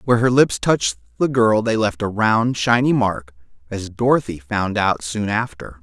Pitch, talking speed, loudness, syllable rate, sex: 110 Hz, 185 wpm, -19 LUFS, 4.7 syllables/s, male